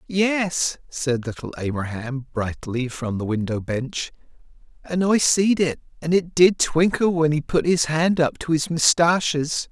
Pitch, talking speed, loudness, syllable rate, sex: 155 Hz, 160 wpm, -21 LUFS, 4.0 syllables/s, male